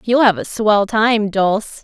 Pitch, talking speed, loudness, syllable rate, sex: 210 Hz, 195 wpm, -15 LUFS, 4.1 syllables/s, female